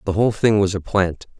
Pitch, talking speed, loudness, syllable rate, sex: 100 Hz, 260 wpm, -19 LUFS, 6.0 syllables/s, male